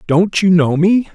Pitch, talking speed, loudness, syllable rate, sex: 180 Hz, 210 wpm, -13 LUFS, 4.0 syllables/s, male